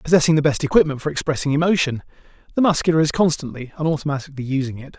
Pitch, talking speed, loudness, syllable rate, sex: 150 Hz, 180 wpm, -20 LUFS, 7.7 syllables/s, male